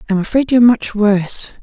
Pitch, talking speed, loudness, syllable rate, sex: 215 Hz, 185 wpm, -14 LUFS, 6.0 syllables/s, female